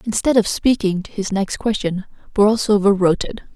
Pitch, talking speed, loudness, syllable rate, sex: 205 Hz, 150 wpm, -18 LUFS, 5.1 syllables/s, female